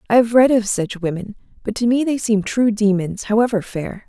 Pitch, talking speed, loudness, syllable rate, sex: 215 Hz, 220 wpm, -18 LUFS, 5.3 syllables/s, female